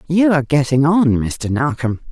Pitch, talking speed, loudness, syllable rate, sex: 145 Hz, 170 wpm, -16 LUFS, 4.8 syllables/s, female